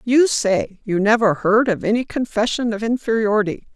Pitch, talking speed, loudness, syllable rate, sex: 220 Hz, 160 wpm, -19 LUFS, 5.1 syllables/s, female